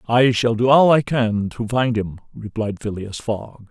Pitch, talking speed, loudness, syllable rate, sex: 115 Hz, 195 wpm, -19 LUFS, 4.2 syllables/s, male